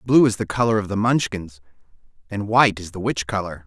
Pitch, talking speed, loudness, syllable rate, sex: 105 Hz, 215 wpm, -21 LUFS, 6.0 syllables/s, male